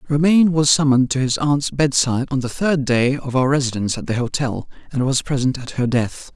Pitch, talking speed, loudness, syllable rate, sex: 135 Hz, 215 wpm, -18 LUFS, 5.7 syllables/s, male